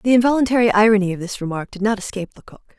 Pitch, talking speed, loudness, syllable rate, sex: 210 Hz, 215 wpm, -18 LUFS, 7.6 syllables/s, female